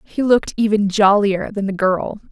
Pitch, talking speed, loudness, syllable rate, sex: 205 Hz, 180 wpm, -17 LUFS, 4.8 syllables/s, female